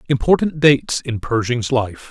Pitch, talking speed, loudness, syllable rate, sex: 130 Hz, 145 wpm, -17 LUFS, 4.7 syllables/s, male